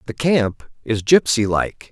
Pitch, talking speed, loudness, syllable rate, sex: 120 Hz, 155 wpm, -18 LUFS, 3.7 syllables/s, male